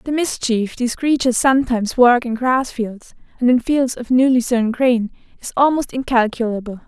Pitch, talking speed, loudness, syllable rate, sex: 245 Hz, 165 wpm, -17 LUFS, 5.1 syllables/s, female